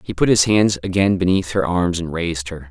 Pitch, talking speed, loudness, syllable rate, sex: 90 Hz, 245 wpm, -18 LUFS, 5.5 syllables/s, male